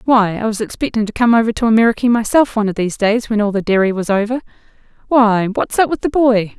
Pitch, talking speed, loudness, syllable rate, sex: 225 Hz, 235 wpm, -15 LUFS, 6.5 syllables/s, female